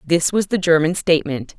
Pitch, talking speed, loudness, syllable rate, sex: 165 Hz, 190 wpm, -18 LUFS, 5.4 syllables/s, female